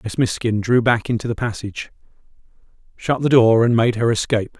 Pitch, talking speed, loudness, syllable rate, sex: 115 Hz, 185 wpm, -18 LUFS, 5.8 syllables/s, male